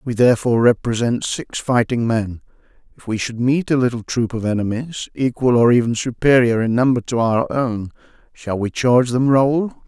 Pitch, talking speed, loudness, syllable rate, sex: 120 Hz, 175 wpm, -18 LUFS, 5.1 syllables/s, male